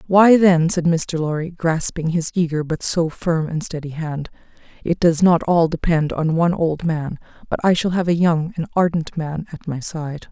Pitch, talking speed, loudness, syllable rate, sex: 165 Hz, 205 wpm, -19 LUFS, 4.6 syllables/s, female